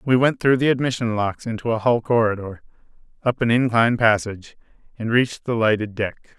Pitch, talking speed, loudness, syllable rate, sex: 115 Hz, 180 wpm, -20 LUFS, 5.8 syllables/s, male